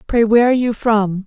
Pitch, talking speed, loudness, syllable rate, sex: 220 Hz, 235 wpm, -15 LUFS, 6.3 syllables/s, female